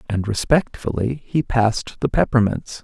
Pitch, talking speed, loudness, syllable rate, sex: 115 Hz, 125 wpm, -20 LUFS, 4.7 syllables/s, male